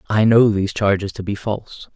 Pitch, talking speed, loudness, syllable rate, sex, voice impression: 105 Hz, 215 wpm, -18 LUFS, 5.8 syllables/s, male, masculine, adult-like, slightly soft, slightly fluent, sincere, calm